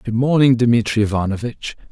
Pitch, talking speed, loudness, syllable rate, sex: 115 Hz, 125 wpm, -17 LUFS, 5.3 syllables/s, male